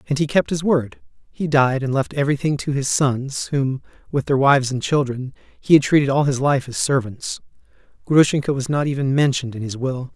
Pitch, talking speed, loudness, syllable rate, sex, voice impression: 140 Hz, 205 wpm, -20 LUFS, 5.5 syllables/s, male, very masculine, slightly middle-aged, very thick, tensed, slightly powerful, slightly dark, slightly hard, clear, very fluent, cool, intellectual, very refreshing, sincere, slightly calm, slightly mature, friendly, slightly reassuring, very unique, elegant, slightly wild, slightly sweet, lively, slightly kind, intense